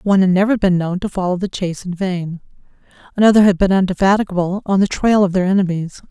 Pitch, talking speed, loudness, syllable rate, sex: 190 Hz, 205 wpm, -16 LUFS, 6.6 syllables/s, female